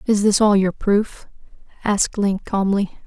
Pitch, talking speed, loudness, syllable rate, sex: 200 Hz, 155 wpm, -19 LUFS, 4.3 syllables/s, female